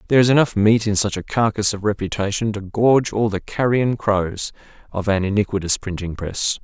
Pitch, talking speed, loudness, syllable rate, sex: 105 Hz, 190 wpm, -19 LUFS, 5.5 syllables/s, male